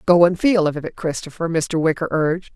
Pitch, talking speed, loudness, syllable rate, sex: 165 Hz, 210 wpm, -19 LUFS, 5.4 syllables/s, female